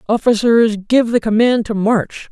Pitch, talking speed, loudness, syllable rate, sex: 220 Hz, 155 wpm, -14 LUFS, 4.2 syllables/s, male